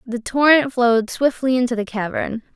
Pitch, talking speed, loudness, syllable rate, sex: 245 Hz, 165 wpm, -18 LUFS, 5.1 syllables/s, female